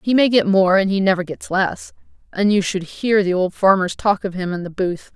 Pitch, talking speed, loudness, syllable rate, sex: 190 Hz, 255 wpm, -18 LUFS, 5.1 syllables/s, female